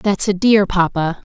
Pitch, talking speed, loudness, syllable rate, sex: 190 Hz, 180 wpm, -16 LUFS, 4.1 syllables/s, female